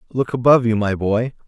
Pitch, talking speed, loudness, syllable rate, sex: 115 Hz, 205 wpm, -18 LUFS, 6.0 syllables/s, male